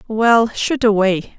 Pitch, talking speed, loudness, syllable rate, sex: 220 Hz, 130 wpm, -15 LUFS, 3.3 syllables/s, female